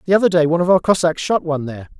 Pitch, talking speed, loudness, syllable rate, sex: 165 Hz, 300 wpm, -16 LUFS, 8.3 syllables/s, male